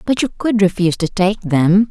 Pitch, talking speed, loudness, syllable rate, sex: 195 Hz, 220 wpm, -16 LUFS, 5.2 syllables/s, female